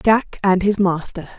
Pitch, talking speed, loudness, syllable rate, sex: 195 Hz, 175 wpm, -18 LUFS, 4.2 syllables/s, female